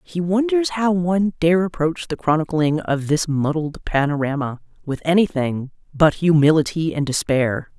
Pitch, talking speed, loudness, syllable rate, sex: 165 Hz, 140 wpm, -19 LUFS, 4.6 syllables/s, female